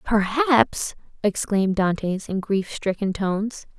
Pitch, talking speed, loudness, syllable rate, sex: 205 Hz, 110 wpm, -23 LUFS, 3.9 syllables/s, female